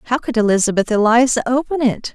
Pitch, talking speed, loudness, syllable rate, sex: 235 Hz, 170 wpm, -16 LUFS, 6.3 syllables/s, female